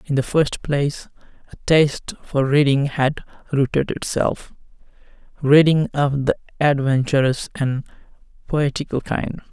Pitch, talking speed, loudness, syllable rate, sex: 140 Hz, 105 wpm, -20 LUFS, 4.4 syllables/s, male